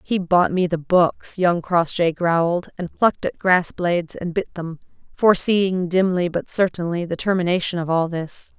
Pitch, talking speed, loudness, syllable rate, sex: 175 Hz, 175 wpm, -20 LUFS, 4.6 syllables/s, female